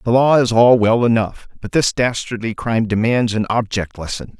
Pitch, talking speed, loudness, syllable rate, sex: 115 Hz, 190 wpm, -17 LUFS, 5.1 syllables/s, male